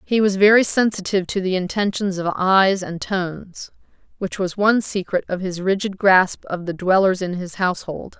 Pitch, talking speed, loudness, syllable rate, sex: 190 Hz, 185 wpm, -19 LUFS, 5.1 syllables/s, female